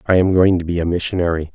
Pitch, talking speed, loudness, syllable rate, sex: 90 Hz, 270 wpm, -17 LUFS, 7.0 syllables/s, male